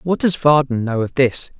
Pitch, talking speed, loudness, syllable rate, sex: 140 Hz, 225 wpm, -17 LUFS, 4.7 syllables/s, male